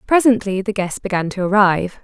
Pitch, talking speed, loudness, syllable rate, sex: 200 Hz, 175 wpm, -17 LUFS, 5.8 syllables/s, female